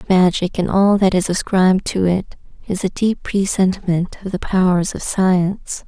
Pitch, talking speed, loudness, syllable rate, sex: 185 Hz, 175 wpm, -17 LUFS, 4.7 syllables/s, female